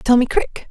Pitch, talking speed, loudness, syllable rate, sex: 245 Hz, 255 wpm, -18 LUFS, 4.5 syllables/s, female